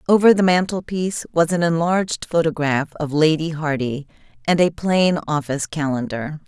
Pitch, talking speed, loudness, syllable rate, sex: 160 Hz, 140 wpm, -20 LUFS, 5.1 syllables/s, female